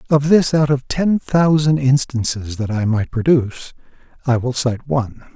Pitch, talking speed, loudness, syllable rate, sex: 135 Hz, 170 wpm, -17 LUFS, 4.7 syllables/s, male